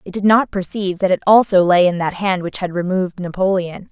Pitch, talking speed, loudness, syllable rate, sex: 185 Hz, 230 wpm, -16 LUFS, 5.9 syllables/s, female